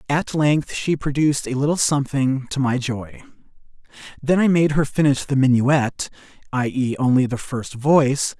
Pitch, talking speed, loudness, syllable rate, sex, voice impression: 135 Hz, 165 wpm, -20 LUFS, 4.8 syllables/s, male, masculine, adult-like, slightly middle-aged, slightly thick, tensed, slightly weak, very bright, slightly hard, very clear, very fluent, very cool, intellectual, very refreshing, very sincere, slightly calm, very friendly, reassuring, unique, wild, very lively, kind, slightly intense, light